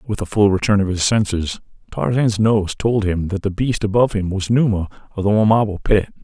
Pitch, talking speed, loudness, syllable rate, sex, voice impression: 100 Hz, 210 wpm, -18 LUFS, 5.6 syllables/s, male, very masculine, very adult-like, thick, cool, slightly calm, elegant, slightly kind